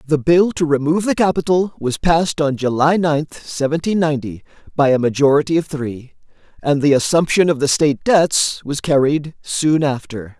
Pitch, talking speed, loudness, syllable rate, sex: 150 Hz, 165 wpm, -17 LUFS, 5.1 syllables/s, male